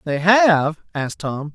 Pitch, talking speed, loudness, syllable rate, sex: 165 Hz, 155 wpm, -18 LUFS, 4.0 syllables/s, male